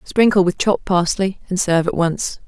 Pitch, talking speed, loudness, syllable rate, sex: 185 Hz, 195 wpm, -18 LUFS, 5.3 syllables/s, female